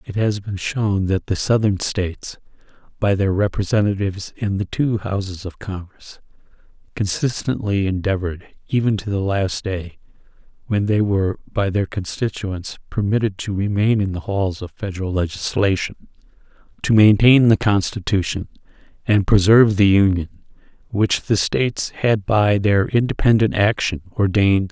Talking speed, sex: 140 wpm, male